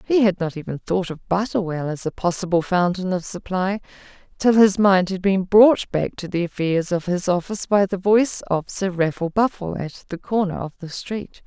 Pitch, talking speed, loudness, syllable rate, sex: 185 Hz, 205 wpm, -21 LUFS, 5.0 syllables/s, female